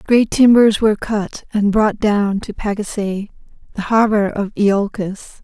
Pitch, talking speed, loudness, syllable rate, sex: 210 Hz, 145 wpm, -16 LUFS, 4.3 syllables/s, female